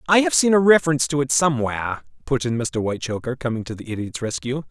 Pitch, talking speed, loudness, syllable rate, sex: 135 Hz, 215 wpm, -21 LUFS, 6.8 syllables/s, male